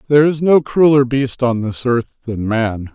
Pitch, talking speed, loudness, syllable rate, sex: 125 Hz, 205 wpm, -15 LUFS, 4.5 syllables/s, male